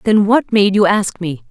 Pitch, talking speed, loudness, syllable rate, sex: 200 Hz, 240 wpm, -14 LUFS, 4.5 syllables/s, female